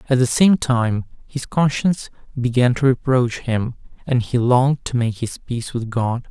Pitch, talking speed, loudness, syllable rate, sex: 125 Hz, 180 wpm, -19 LUFS, 4.7 syllables/s, male